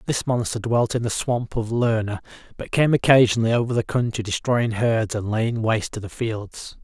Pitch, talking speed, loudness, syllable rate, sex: 115 Hz, 185 wpm, -22 LUFS, 4.9 syllables/s, male